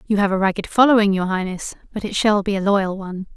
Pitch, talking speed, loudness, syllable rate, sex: 200 Hz, 250 wpm, -19 LUFS, 6.4 syllables/s, female